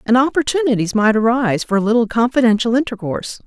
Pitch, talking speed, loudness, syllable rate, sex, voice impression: 235 Hz, 155 wpm, -16 LUFS, 6.7 syllables/s, female, very feminine, very adult-like, middle-aged, thin, tensed, slightly powerful, bright, very soft, very clear, fluent, slightly raspy, cute, very intellectual, very refreshing, sincere, very calm, very friendly, very reassuring, very elegant, sweet, slightly lively, kind, slightly intense, slightly modest, light